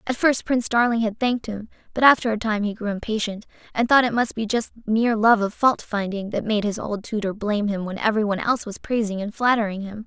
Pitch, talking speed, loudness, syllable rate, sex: 220 Hz, 240 wpm, -22 LUFS, 6.2 syllables/s, female